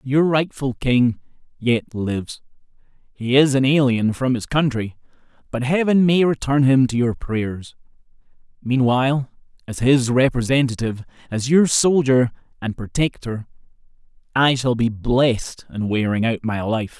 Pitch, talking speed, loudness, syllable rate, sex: 125 Hz, 135 wpm, -19 LUFS, 4.6 syllables/s, male